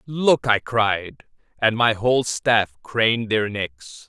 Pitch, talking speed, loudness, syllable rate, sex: 110 Hz, 145 wpm, -20 LUFS, 3.3 syllables/s, male